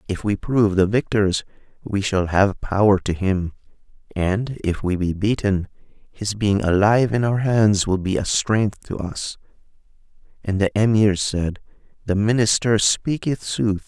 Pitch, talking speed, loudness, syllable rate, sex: 100 Hz, 155 wpm, -20 LUFS, 4.3 syllables/s, male